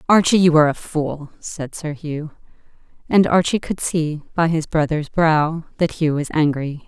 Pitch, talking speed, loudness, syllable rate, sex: 155 Hz, 175 wpm, -19 LUFS, 4.5 syllables/s, female